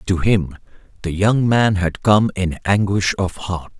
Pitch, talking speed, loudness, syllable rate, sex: 95 Hz, 175 wpm, -18 LUFS, 3.9 syllables/s, male